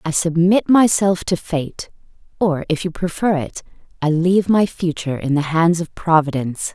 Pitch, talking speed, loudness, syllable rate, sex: 170 Hz, 170 wpm, -18 LUFS, 4.9 syllables/s, female